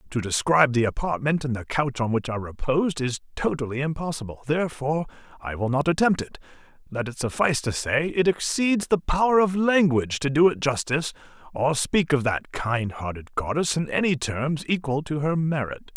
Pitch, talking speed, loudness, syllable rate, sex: 140 Hz, 185 wpm, -24 LUFS, 5.5 syllables/s, male